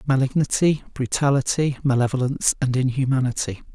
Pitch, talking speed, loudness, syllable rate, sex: 135 Hz, 80 wpm, -21 LUFS, 5.7 syllables/s, male